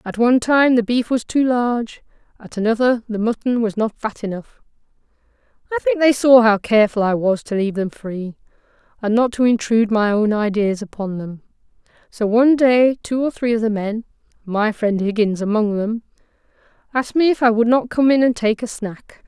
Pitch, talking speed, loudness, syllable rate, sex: 225 Hz, 190 wpm, -18 LUFS, 5.4 syllables/s, female